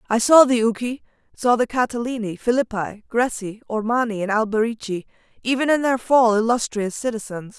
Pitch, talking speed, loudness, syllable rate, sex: 230 Hz, 140 wpm, -20 LUFS, 5.4 syllables/s, female